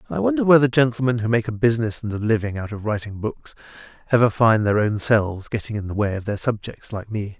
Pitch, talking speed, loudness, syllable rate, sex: 110 Hz, 245 wpm, -21 LUFS, 6.3 syllables/s, male